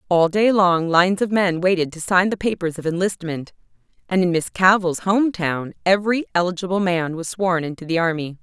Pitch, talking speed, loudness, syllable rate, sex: 180 Hz, 190 wpm, -19 LUFS, 5.4 syllables/s, female